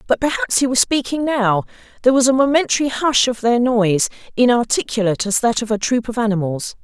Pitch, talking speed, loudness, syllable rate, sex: 235 Hz, 195 wpm, -17 LUFS, 6.1 syllables/s, female